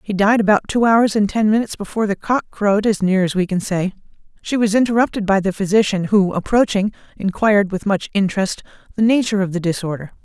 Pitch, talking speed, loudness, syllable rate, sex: 205 Hz, 205 wpm, -17 LUFS, 6.3 syllables/s, female